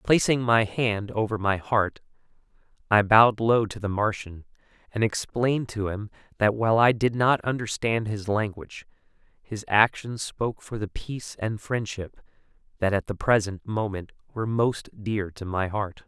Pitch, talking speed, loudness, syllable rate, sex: 110 Hz, 160 wpm, -25 LUFS, 4.8 syllables/s, male